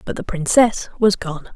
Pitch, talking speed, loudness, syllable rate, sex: 195 Hz, 195 wpm, -18 LUFS, 4.5 syllables/s, female